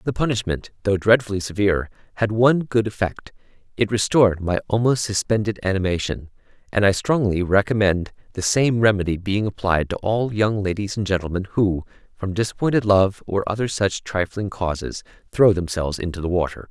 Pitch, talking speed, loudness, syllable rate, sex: 100 Hz, 155 wpm, -21 LUFS, 5.5 syllables/s, male